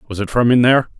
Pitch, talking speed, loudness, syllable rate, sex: 120 Hz, 305 wpm, -14 LUFS, 6.7 syllables/s, male